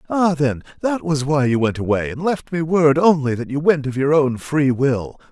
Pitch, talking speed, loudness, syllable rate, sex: 145 Hz, 235 wpm, -18 LUFS, 4.7 syllables/s, male